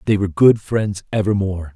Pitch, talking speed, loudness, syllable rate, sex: 100 Hz, 170 wpm, -18 LUFS, 5.9 syllables/s, male